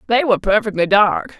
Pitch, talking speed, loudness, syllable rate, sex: 210 Hz, 175 wpm, -16 LUFS, 5.8 syllables/s, female